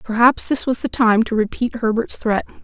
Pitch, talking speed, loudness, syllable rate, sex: 230 Hz, 205 wpm, -18 LUFS, 5.0 syllables/s, female